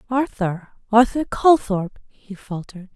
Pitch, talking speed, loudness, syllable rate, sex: 220 Hz, 100 wpm, -20 LUFS, 6.4 syllables/s, female